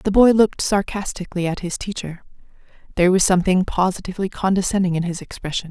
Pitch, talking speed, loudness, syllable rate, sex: 185 Hz, 160 wpm, -20 LUFS, 6.7 syllables/s, female